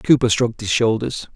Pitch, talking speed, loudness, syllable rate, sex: 115 Hz, 175 wpm, -18 LUFS, 5.4 syllables/s, male